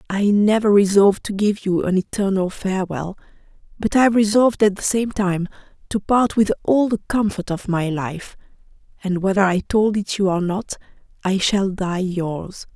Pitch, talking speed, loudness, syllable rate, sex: 195 Hz, 175 wpm, -19 LUFS, 4.5 syllables/s, female